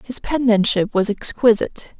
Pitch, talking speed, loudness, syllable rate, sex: 225 Hz, 120 wpm, -18 LUFS, 4.8 syllables/s, female